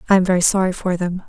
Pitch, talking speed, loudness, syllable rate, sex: 185 Hz, 280 wpm, -18 LUFS, 7.5 syllables/s, female